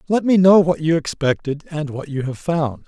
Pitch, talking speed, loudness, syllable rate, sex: 155 Hz, 230 wpm, -18 LUFS, 5.0 syllables/s, male